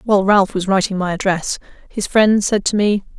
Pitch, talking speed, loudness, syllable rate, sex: 195 Hz, 205 wpm, -16 LUFS, 5.3 syllables/s, female